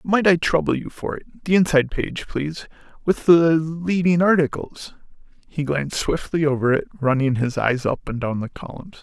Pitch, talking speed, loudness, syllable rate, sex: 150 Hz, 175 wpm, -21 LUFS, 5.0 syllables/s, male